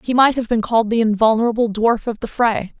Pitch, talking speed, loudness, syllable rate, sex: 225 Hz, 235 wpm, -17 LUFS, 6.0 syllables/s, female